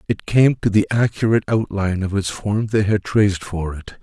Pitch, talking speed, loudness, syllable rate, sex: 100 Hz, 225 wpm, -19 LUFS, 5.1 syllables/s, male